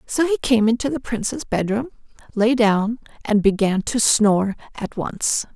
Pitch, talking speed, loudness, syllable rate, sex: 225 Hz, 160 wpm, -20 LUFS, 4.5 syllables/s, female